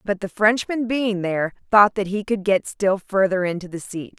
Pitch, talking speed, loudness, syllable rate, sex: 200 Hz, 215 wpm, -21 LUFS, 5.0 syllables/s, female